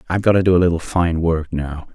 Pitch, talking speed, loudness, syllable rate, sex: 85 Hz, 275 wpm, -18 LUFS, 6.5 syllables/s, male